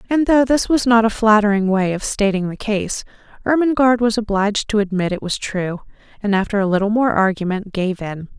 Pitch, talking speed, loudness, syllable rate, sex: 210 Hz, 200 wpm, -18 LUFS, 5.6 syllables/s, female